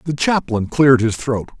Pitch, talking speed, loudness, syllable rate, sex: 130 Hz, 190 wpm, -16 LUFS, 5.1 syllables/s, male